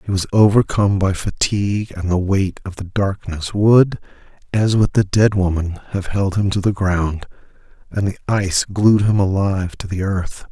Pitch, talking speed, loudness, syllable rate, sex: 95 Hz, 185 wpm, -18 LUFS, 4.7 syllables/s, male